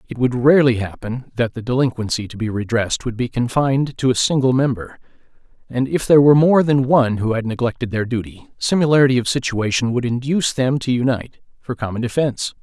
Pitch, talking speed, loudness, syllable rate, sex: 125 Hz, 190 wpm, -18 LUFS, 6.2 syllables/s, male